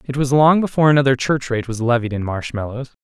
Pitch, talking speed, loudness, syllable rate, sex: 130 Hz, 220 wpm, -18 LUFS, 6.3 syllables/s, male